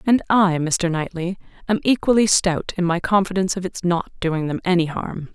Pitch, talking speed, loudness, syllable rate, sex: 180 Hz, 190 wpm, -20 LUFS, 5.2 syllables/s, female